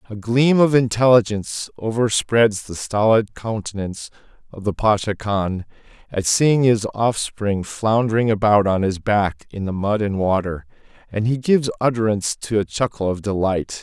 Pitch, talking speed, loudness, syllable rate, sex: 105 Hz, 150 wpm, -19 LUFS, 4.7 syllables/s, male